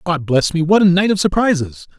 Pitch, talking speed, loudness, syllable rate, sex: 170 Hz, 240 wpm, -15 LUFS, 5.7 syllables/s, male